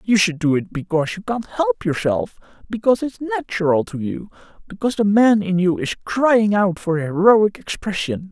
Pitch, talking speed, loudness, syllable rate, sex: 190 Hz, 180 wpm, -19 LUFS, 4.9 syllables/s, male